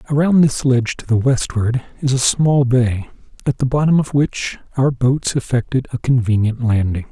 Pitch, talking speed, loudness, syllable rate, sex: 125 Hz, 175 wpm, -17 LUFS, 4.8 syllables/s, male